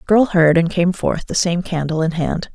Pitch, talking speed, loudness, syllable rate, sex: 175 Hz, 260 wpm, -17 LUFS, 5.1 syllables/s, female